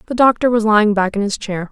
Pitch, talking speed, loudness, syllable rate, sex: 215 Hz, 280 wpm, -15 LUFS, 6.5 syllables/s, female